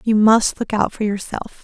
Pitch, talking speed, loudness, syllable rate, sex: 215 Hz, 220 wpm, -18 LUFS, 4.6 syllables/s, female